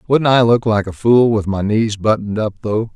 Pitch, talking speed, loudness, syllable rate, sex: 110 Hz, 245 wpm, -15 LUFS, 5.2 syllables/s, male